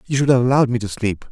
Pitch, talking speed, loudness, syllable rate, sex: 120 Hz, 320 wpm, -18 LUFS, 7.7 syllables/s, male